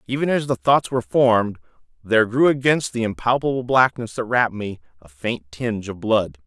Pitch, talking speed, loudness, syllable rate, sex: 115 Hz, 185 wpm, -20 LUFS, 5.6 syllables/s, male